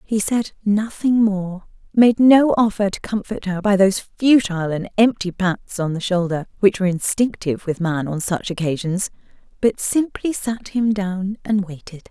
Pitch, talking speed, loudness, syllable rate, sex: 200 Hz, 170 wpm, -19 LUFS, 4.7 syllables/s, female